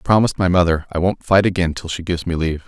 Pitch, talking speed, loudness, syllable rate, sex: 90 Hz, 290 wpm, -18 LUFS, 7.8 syllables/s, male